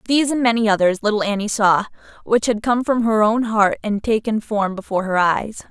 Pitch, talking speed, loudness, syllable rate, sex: 215 Hz, 210 wpm, -18 LUFS, 5.5 syllables/s, female